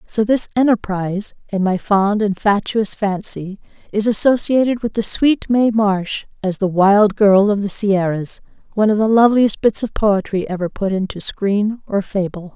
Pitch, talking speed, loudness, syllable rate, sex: 205 Hz, 165 wpm, -17 LUFS, 4.6 syllables/s, female